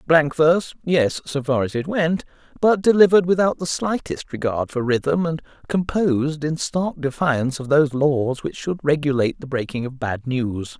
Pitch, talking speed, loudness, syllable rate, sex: 150 Hz, 180 wpm, -21 LUFS, 4.9 syllables/s, male